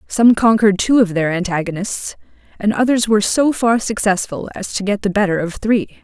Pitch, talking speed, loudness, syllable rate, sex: 205 Hz, 190 wpm, -16 LUFS, 5.2 syllables/s, female